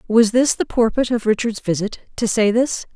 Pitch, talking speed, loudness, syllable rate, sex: 225 Hz, 185 wpm, -18 LUFS, 5.0 syllables/s, female